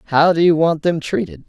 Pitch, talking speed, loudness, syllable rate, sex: 155 Hz, 245 wpm, -16 LUFS, 5.6 syllables/s, male